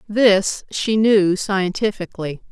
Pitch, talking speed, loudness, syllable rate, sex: 200 Hz, 95 wpm, -18 LUFS, 3.6 syllables/s, female